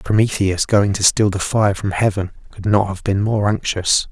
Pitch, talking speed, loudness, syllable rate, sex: 100 Hz, 205 wpm, -17 LUFS, 4.7 syllables/s, male